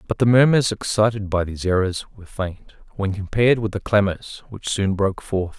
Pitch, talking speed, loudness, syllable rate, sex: 100 Hz, 195 wpm, -20 LUFS, 5.5 syllables/s, male